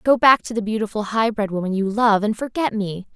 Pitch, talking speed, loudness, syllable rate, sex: 215 Hz, 245 wpm, -20 LUFS, 5.7 syllables/s, female